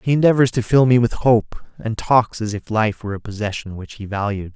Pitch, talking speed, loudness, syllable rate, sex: 110 Hz, 235 wpm, -19 LUFS, 5.5 syllables/s, male